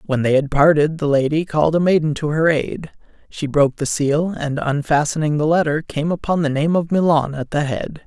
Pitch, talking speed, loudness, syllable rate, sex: 150 Hz, 215 wpm, -18 LUFS, 5.3 syllables/s, male